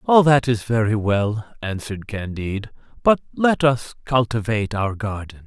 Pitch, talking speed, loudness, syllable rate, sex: 115 Hz, 145 wpm, -21 LUFS, 4.7 syllables/s, male